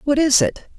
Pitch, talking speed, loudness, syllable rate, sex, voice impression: 265 Hz, 230 wpm, -17 LUFS, 4.8 syllables/s, female, feminine, very adult-like, middle-aged, slightly thin, very tensed, powerful, bright, hard, very clear, fluent, slightly raspy, cool, slightly intellectual, refreshing, sincere, calm, slightly friendly, reassuring, unique, slightly wild, lively, slightly strict, slightly sharp